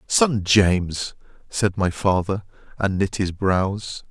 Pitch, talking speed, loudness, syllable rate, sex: 95 Hz, 130 wpm, -22 LUFS, 3.4 syllables/s, male